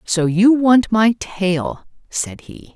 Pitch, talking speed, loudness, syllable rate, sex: 200 Hz, 155 wpm, -17 LUFS, 2.9 syllables/s, female